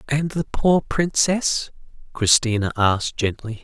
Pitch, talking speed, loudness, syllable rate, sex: 135 Hz, 115 wpm, -20 LUFS, 4.0 syllables/s, male